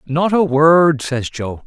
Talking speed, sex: 180 wpm, male